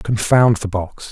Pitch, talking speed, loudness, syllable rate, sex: 105 Hz, 160 wpm, -16 LUFS, 3.7 syllables/s, male